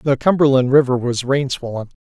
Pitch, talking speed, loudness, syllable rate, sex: 135 Hz, 175 wpm, -16 LUFS, 5.4 syllables/s, male